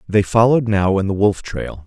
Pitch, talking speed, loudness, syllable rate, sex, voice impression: 105 Hz, 225 wpm, -17 LUFS, 5.3 syllables/s, male, very masculine, middle-aged, very thick, slightly relaxed, powerful, slightly bright, slightly soft, clear, fluent, slightly raspy, very cool, intellectual, refreshing, very sincere, very calm, very mature, very friendly, reassuring, unique, elegant, slightly wild, sweet, slightly lively, kind, slightly modest